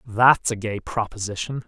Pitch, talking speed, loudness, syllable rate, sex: 110 Hz, 145 wpm, -22 LUFS, 4.5 syllables/s, male